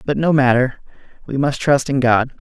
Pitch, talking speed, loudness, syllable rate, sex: 135 Hz, 195 wpm, -17 LUFS, 4.9 syllables/s, male